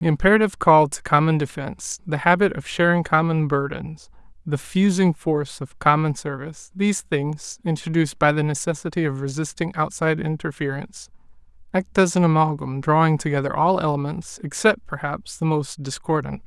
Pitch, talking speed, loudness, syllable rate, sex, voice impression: 160 Hz, 145 wpm, -21 LUFS, 5.4 syllables/s, male, masculine, adult-like, slightly relaxed, slightly weak, soft, muffled, slightly halting, slightly raspy, slightly calm, friendly, kind, modest